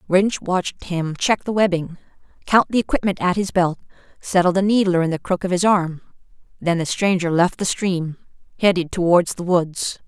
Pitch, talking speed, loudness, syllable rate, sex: 180 Hz, 185 wpm, -20 LUFS, 5.1 syllables/s, female